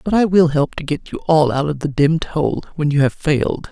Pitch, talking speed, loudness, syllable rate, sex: 155 Hz, 275 wpm, -17 LUFS, 5.4 syllables/s, female